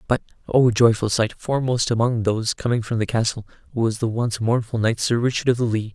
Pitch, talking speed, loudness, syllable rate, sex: 115 Hz, 190 wpm, -21 LUFS, 5.8 syllables/s, male